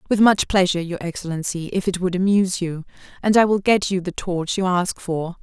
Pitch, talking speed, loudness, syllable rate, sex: 185 Hz, 220 wpm, -20 LUFS, 5.6 syllables/s, female